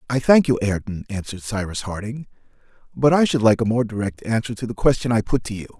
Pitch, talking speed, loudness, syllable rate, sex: 115 Hz, 230 wpm, -21 LUFS, 6.2 syllables/s, male